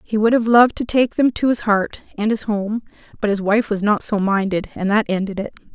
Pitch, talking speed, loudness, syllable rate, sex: 215 Hz, 250 wpm, -18 LUFS, 5.6 syllables/s, female